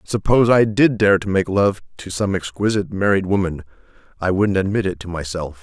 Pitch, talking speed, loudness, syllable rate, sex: 95 Hz, 180 wpm, -18 LUFS, 5.6 syllables/s, male